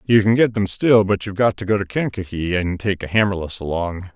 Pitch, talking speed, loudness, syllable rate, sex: 100 Hz, 245 wpm, -19 LUFS, 5.7 syllables/s, male